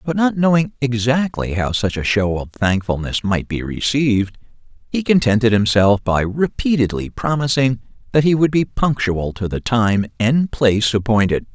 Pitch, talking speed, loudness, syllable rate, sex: 120 Hz, 155 wpm, -18 LUFS, 4.7 syllables/s, male